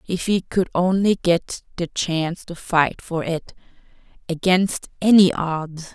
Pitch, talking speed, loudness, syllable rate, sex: 175 Hz, 130 wpm, -20 LUFS, 3.9 syllables/s, female